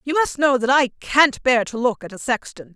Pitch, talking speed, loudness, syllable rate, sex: 250 Hz, 260 wpm, -19 LUFS, 4.9 syllables/s, female